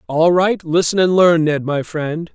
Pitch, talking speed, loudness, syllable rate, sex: 165 Hz, 205 wpm, -16 LUFS, 4.2 syllables/s, male